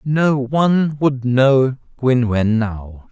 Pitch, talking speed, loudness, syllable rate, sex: 130 Hz, 135 wpm, -17 LUFS, 2.9 syllables/s, male